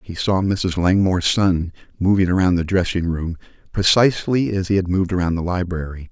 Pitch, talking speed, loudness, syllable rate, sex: 90 Hz, 175 wpm, -19 LUFS, 5.6 syllables/s, male